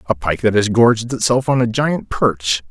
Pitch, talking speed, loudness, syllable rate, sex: 115 Hz, 220 wpm, -16 LUFS, 4.8 syllables/s, male